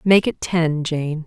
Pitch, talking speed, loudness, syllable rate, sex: 165 Hz, 190 wpm, -20 LUFS, 3.4 syllables/s, female